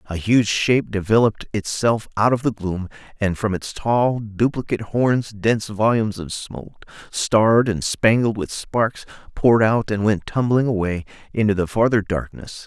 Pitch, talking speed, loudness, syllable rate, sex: 110 Hz, 160 wpm, -20 LUFS, 4.8 syllables/s, male